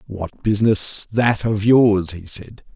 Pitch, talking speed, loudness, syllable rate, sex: 105 Hz, 150 wpm, -18 LUFS, 3.7 syllables/s, male